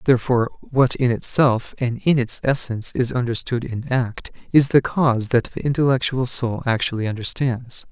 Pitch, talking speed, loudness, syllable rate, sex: 125 Hz, 160 wpm, -20 LUFS, 5.1 syllables/s, male